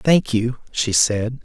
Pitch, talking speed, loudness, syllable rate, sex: 125 Hz, 165 wpm, -19 LUFS, 3.2 syllables/s, male